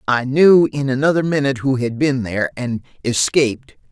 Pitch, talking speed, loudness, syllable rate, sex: 135 Hz, 170 wpm, -17 LUFS, 5.3 syllables/s, male